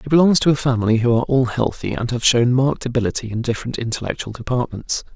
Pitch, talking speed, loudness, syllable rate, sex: 125 Hz, 210 wpm, -19 LUFS, 6.9 syllables/s, male